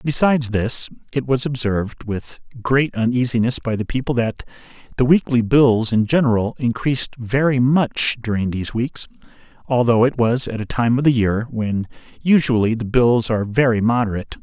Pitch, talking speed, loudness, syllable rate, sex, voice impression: 120 Hz, 160 wpm, -19 LUFS, 5.1 syllables/s, male, very masculine, adult-like, thick, tensed, very powerful, bright, slightly soft, very clear, fluent, cool, intellectual, very refreshing, very sincere, calm, very friendly, very reassuring, unique, very elegant, lively, very kind, slightly intense, light